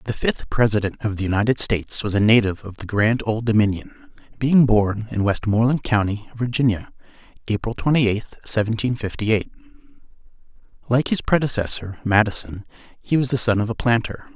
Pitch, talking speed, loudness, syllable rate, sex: 110 Hz, 160 wpm, -21 LUFS, 5.7 syllables/s, male